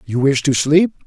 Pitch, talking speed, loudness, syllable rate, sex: 145 Hz, 225 wpm, -15 LUFS, 4.5 syllables/s, male